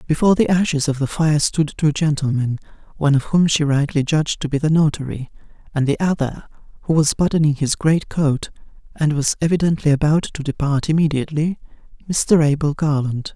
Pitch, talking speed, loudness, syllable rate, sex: 150 Hz, 170 wpm, -18 LUFS, 4.9 syllables/s, male